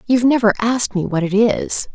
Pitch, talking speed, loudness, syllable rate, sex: 220 Hz, 215 wpm, -17 LUFS, 5.8 syllables/s, female